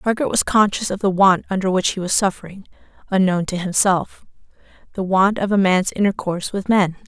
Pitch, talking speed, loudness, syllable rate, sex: 190 Hz, 185 wpm, -18 LUFS, 5.8 syllables/s, female